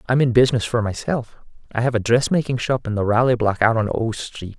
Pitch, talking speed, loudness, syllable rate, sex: 115 Hz, 235 wpm, -20 LUFS, 6.0 syllables/s, male